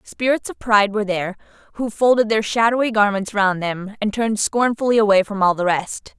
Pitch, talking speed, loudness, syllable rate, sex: 210 Hz, 195 wpm, -19 LUFS, 5.7 syllables/s, female